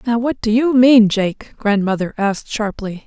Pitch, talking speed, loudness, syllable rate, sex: 220 Hz, 175 wpm, -16 LUFS, 4.5 syllables/s, female